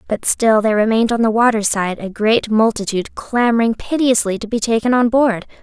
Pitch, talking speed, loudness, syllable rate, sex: 225 Hz, 190 wpm, -16 LUFS, 5.6 syllables/s, female